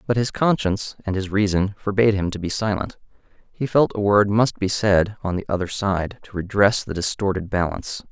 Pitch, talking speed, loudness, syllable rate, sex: 100 Hz, 200 wpm, -21 LUFS, 5.5 syllables/s, male